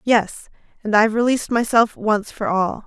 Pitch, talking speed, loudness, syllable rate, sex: 220 Hz, 165 wpm, -19 LUFS, 5.1 syllables/s, female